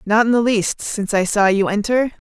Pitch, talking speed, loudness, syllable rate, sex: 215 Hz, 240 wpm, -17 LUFS, 5.2 syllables/s, female